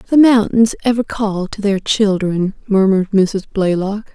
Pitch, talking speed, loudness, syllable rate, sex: 205 Hz, 145 wpm, -15 LUFS, 4.5 syllables/s, female